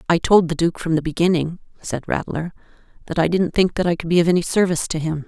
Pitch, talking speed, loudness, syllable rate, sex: 170 Hz, 250 wpm, -20 LUFS, 6.5 syllables/s, female